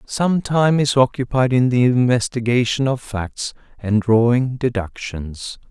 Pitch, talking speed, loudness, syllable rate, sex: 120 Hz, 125 wpm, -18 LUFS, 4.0 syllables/s, male